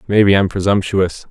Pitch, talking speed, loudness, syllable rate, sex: 95 Hz, 140 wpm, -15 LUFS, 5.2 syllables/s, male